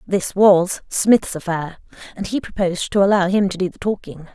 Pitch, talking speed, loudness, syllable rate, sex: 190 Hz, 195 wpm, -18 LUFS, 5.1 syllables/s, female